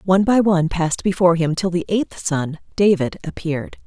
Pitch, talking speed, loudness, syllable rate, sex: 175 Hz, 185 wpm, -19 LUFS, 5.8 syllables/s, female